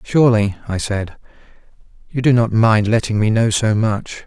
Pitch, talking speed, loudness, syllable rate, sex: 110 Hz, 170 wpm, -17 LUFS, 4.8 syllables/s, male